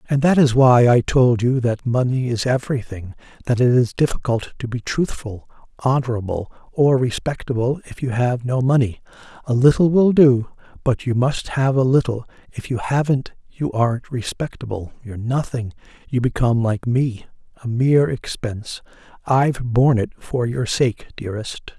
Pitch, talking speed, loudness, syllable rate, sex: 125 Hz, 160 wpm, -19 LUFS, 5.0 syllables/s, male